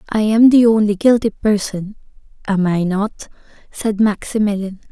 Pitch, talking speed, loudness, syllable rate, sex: 210 Hz, 135 wpm, -16 LUFS, 4.5 syllables/s, female